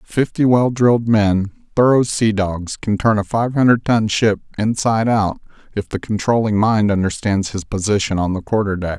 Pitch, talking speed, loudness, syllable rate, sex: 105 Hz, 180 wpm, -17 LUFS, 4.9 syllables/s, male